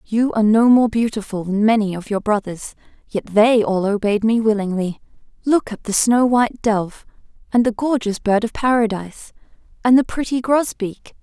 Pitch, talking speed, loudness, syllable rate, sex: 220 Hz, 170 wpm, -18 LUFS, 5.0 syllables/s, female